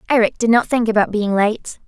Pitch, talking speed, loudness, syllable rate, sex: 220 Hz, 225 wpm, -17 LUFS, 5.7 syllables/s, female